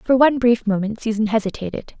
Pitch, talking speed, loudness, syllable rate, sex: 225 Hz, 180 wpm, -19 LUFS, 6.2 syllables/s, female